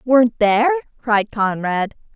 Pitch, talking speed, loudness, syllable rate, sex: 230 Hz, 110 wpm, -18 LUFS, 4.6 syllables/s, female